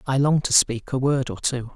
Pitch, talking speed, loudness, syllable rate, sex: 135 Hz, 275 wpm, -21 LUFS, 5.0 syllables/s, male